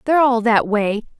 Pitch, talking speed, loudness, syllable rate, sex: 235 Hz, 200 wpm, -17 LUFS, 5.6 syllables/s, female